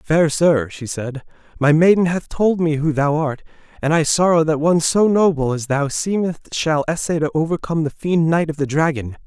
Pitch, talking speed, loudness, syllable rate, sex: 155 Hz, 205 wpm, -18 LUFS, 5.0 syllables/s, male